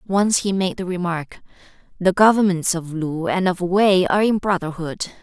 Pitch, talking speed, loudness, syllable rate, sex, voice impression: 180 Hz, 170 wpm, -19 LUFS, 4.9 syllables/s, female, feminine, adult-like, slightly calm, slightly unique